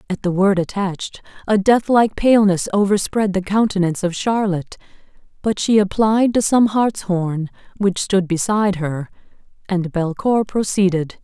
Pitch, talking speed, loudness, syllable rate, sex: 195 Hz, 140 wpm, -18 LUFS, 4.8 syllables/s, female